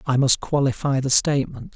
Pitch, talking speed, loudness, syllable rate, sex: 135 Hz, 170 wpm, -20 LUFS, 5.6 syllables/s, male